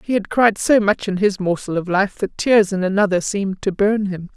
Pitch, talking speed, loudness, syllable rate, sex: 200 Hz, 250 wpm, -18 LUFS, 5.2 syllables/s, female